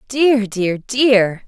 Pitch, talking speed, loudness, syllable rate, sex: 225 Hz, 120 wpm, -16 LUFS, 2.4 syllables/s, female